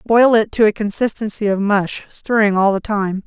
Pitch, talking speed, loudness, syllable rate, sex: 210 Hz, 200 wpm, -16 LUFS, 4.9 syllables/s, female